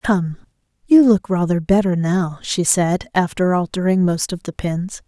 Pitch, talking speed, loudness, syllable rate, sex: 185 Hz, 165 wpm, -18 LUFS, 4.3 syllables/s, female